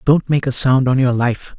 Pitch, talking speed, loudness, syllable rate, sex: 130 Hz, 265 wpm, -16 LUFS, 4.7 syllables/s, male